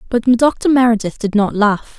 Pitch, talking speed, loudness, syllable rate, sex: 230 Hz, 180 wpm, -14 LUFS, 4.5 syllables/s, female